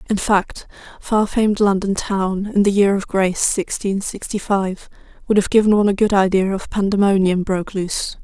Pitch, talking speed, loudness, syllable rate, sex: 200 Hz, 180 wpm, -18 LUFS, 5.2 syllables/s, female